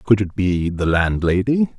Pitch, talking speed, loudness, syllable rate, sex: 100 Hz, 170 wpm, -19 LUFS, 4.1 syllables/s, male